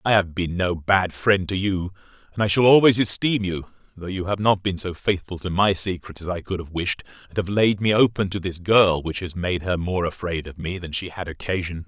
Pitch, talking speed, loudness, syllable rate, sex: 95 Hz, 250 wpm, -22 LUFS, 5.3 syllables/s, male